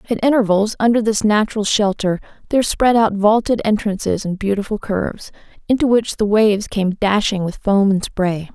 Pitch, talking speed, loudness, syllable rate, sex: 210 Hz, 170 wpm, -17 LUFS, 5.3 syllables/s, female